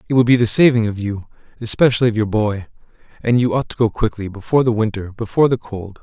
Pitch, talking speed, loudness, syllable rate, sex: 110 Hz, 220 wpm, -17 LUFS, 6.7 syllables/s, male